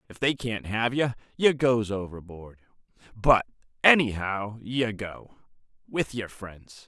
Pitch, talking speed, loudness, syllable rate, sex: 110 Hz, 120 wpm, -26 LUFS, 3.9 syllables/s, male